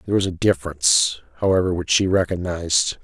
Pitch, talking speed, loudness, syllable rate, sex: 90 Hz, 160 wpm, -20 LUFS, 6.3 syllables/s, male